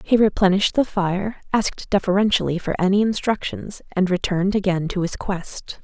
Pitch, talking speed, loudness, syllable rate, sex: 195 Hz, 155 wpm, -21 LUFS, 5.3 syllables/s, female